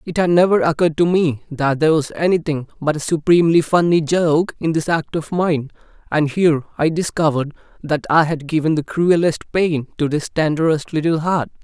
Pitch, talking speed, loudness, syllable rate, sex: 160 Hz, 185 wpm, -18 LUFS, 5.4 syllables/s, male